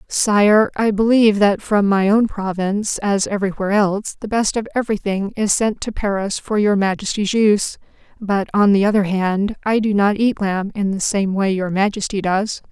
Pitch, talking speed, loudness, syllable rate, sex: 205 Hz, 190 wpm, -18 LUFS, 5.0 syllables/s, female